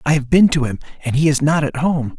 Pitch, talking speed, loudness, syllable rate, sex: 145 Hz, 305 wpm, -17 LUFS, 5.9 syllables/s, male